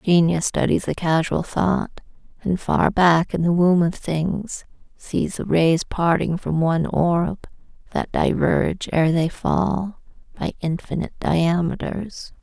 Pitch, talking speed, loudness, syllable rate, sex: 175 Hz, 135 wpm, -21 LUFS, 3.8 syllables/s, female